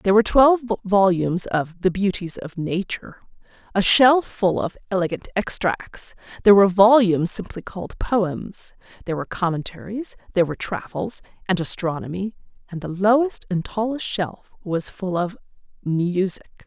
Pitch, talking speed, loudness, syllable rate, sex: 190 Hz, 140 wpm, -21 LUFS, 5.1 syllables/s, female